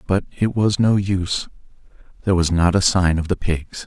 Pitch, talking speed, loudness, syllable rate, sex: 95 Hz, 200 wpm, -19 LUFS, 5.3 syllables/s, male